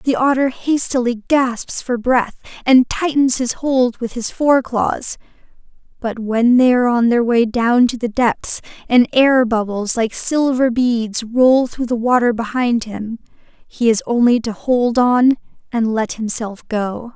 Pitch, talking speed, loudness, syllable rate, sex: 240 Hz, 165 wpm, -16 LUFS, 3.9 syllables/s, female